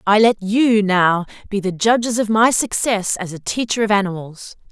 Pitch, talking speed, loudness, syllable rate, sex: 205 Hz, 190 wpm, -17 LUFS, 4.8 syllables/s, female